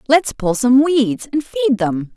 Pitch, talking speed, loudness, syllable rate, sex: 255 Hz, 195 wpm, -16 LUFS, 3.8 syllables/s, female